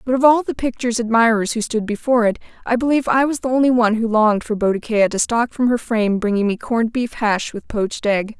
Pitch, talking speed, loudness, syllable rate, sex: 230 Hz, 245 wpm, -18 LUFS, 6.4 syllables/s, female